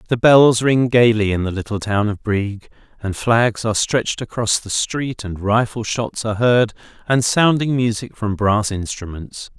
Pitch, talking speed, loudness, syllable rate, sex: 110 Hz, 175 wpm, -18 LUFS, 4.5 syllables/s, male